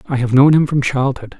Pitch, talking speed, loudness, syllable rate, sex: 135 Hz, 260 wpm, -14 LUFS, 5.5 syllables/s, male